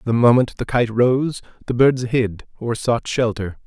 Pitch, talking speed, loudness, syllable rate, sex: 120 Hz, 180 wpm, -19 LUFS, 4.2 syllables/s, male